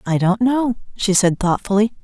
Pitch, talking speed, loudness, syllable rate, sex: 205 Hz, 175 wpm, -18 LUFS, 4.8 syllables/s, female